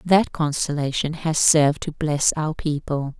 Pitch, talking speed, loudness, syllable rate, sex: 150 Hz, 150 wpm, -21 LUFS, 4.3 syllables/s, female